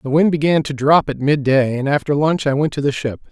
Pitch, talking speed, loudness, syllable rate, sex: 145 Hz, 270 wpm, -17 LUFS, 5.6 syllables/s, male